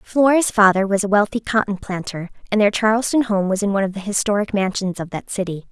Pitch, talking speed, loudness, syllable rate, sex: 205 Hz, 220 wpm, -19 LUFS, 6.2 syllables/s, female